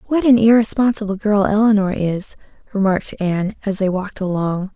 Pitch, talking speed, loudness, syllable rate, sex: 200 Hz, 150 wpm, -17 LUFS, 5.6 syllables/s, female